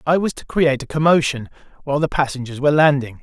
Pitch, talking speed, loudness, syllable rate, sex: 145 Hz, 205 wpm, -18 LUFS, 6.9 syllables/s, male